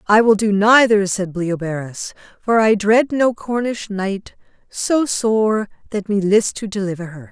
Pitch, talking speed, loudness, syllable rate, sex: 205 Hz, 165 wpm, -17 LUFS, 4.1 syllables/s, female